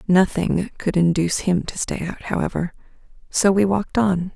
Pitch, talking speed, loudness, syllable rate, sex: 185 Hz, 165 wpm, -21 LUFS, 5.0 syllables/s, female